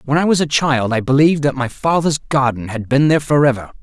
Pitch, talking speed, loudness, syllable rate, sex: 140 Hz, 250 wpm, -16 LUFS, 6.1 syllables/s, male